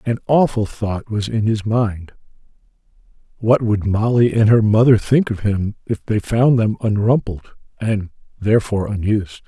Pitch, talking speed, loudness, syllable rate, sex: 110 Hz, 150 wpm, -18 LUFS, 4.6 syllables/s, male